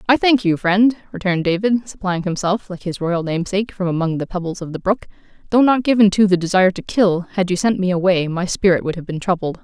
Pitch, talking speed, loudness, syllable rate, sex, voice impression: 190 Hz, 235 wpm, -18 LUFS, 6.2 syllables/s, female, very feminine, very adult-like, middle-aged, very thin, slightly relaxed, slightly powerful, bright, slightly hard, very clear, very fluent, slightly cute, cool, very intellectual, refreshing, sincere, calm, friendly, reassuring, slightly unique, very elegant, slightly wild, sweet, very lively, strict, slightly intense, sharp, light